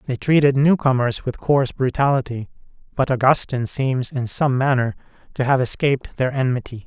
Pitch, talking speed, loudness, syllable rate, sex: 130 Hz, 155 wpm, -19 LUFS, 5.4 syllables/s, male